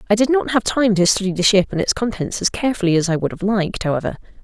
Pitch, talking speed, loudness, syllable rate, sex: 200 Hz, 270 wpm, -18 LUFS, 7.1 syllables/s, female